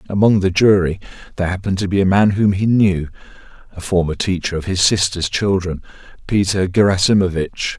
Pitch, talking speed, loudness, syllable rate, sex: 95 Hz, 160 wpm, -16 LUFS, 5.7 syllables/s, male